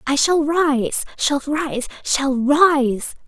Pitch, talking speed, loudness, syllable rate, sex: 285 Hz, 130 wpm, -18 LUFS, 3.2 syllables/s, female